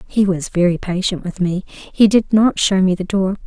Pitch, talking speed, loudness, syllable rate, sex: 190 Hz, 225 wpm, -17 LUFS, 4.7 syllables/s, female